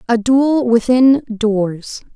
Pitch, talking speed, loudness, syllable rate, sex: 235 Hz, 110 wpm, -14 LUFS, 2.7 syllables/s, female